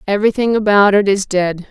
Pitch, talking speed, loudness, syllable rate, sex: 200 Hz, 175 wpm, -14 LUFS, 5.8 syllables/s, female